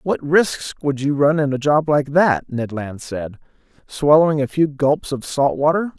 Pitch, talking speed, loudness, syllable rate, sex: 145 Hz, 200 wpm, -18 LUFS, 4.4 syllables/s, male